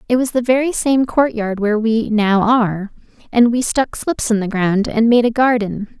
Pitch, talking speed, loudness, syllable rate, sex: 230 Hz, 220 wpm, -16 LUFS, 4.8 syllables/s, female